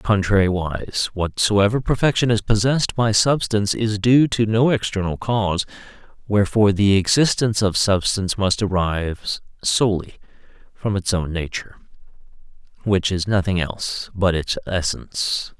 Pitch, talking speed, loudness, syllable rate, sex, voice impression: 100 Hz, 125 wpm, -20 LUFS, 5.0 syllables/s, male, masculine, middle-aged, tensed, slightly powerful, bright, slightly hard, clear, slightly nasal, cool, intellectual, calm, slightly friendly, wild, slightly kind